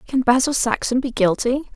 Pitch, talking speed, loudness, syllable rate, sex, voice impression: 250 Hz, 170 wpm, -19 LUFS, 5.0 syllables/s, female, feminine, adult-like, slightly relaxed, powerful, soft, clear, intellectual, calm, friendly, reassuring, kind, modest